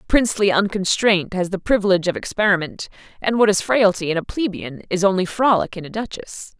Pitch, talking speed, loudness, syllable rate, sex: 195 Hz, 180 wpm, -19 LUFS, 5.8 syllables/s, female